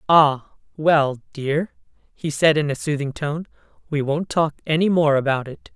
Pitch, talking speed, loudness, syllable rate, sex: 150 Hz, 165 wpm, -21 LUFS, 4.4 syllables/s, female